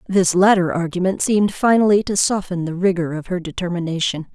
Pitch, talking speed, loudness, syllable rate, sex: 185 Hz, 165 wpm, -18 LUFS, 5.8 syllables/s, female